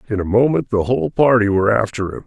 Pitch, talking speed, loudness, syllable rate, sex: 110 Hz, 240 wpm, -17 LUFS, 6.9 syllables/s, male